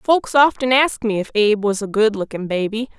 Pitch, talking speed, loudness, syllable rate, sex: 225 Hz, 220 wpm, -18 LUFS, 5.3 syllables/s, female